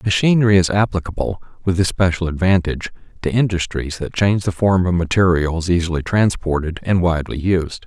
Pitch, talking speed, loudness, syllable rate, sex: 90 Hz, 145 wpm, -18 LUFS, 5.7 syllables/s, male